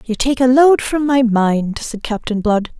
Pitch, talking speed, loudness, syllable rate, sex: 240 Hz, 215 wpm, -15 LUFS, 4.1 syllables/s, female